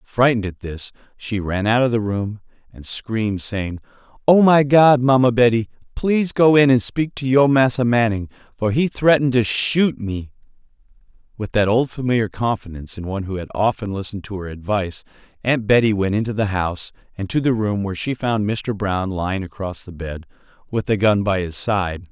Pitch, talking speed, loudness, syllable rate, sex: 110 Hz, 195 wpm, -19 LUFS, 5.4 syllables/s, male